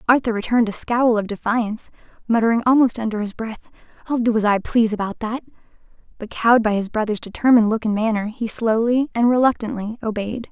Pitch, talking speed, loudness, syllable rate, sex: 225 Hz, 185 wpm, -19 LUFS, 6.3 syllables/s, female